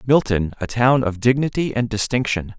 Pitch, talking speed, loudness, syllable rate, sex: 120 Hz, 140 wpm, -19 LUFS, 4.9 syllables/s, male